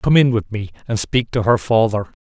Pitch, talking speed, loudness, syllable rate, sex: 110 Hz, 240 wpm, -18 LUFS, 5.1 syllables/s, male